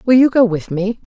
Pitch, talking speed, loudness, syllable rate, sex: 215 Hz, 270 wpm, -15 LUFS, 5.4 syllables/s, female